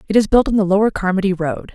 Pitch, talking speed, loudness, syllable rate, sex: 195 Hz, 275 wpm, -16 LUFS, 7.0 syllables/s, female